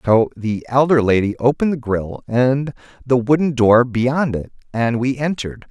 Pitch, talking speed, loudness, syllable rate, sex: 125 Hz, 170 wpm, -17 LUFS, 4.9 syllables/s, male